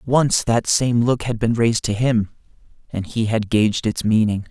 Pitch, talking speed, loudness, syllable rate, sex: 115 Hz, 200 wpm, -19 LUFS, 4.8 syllables/s, male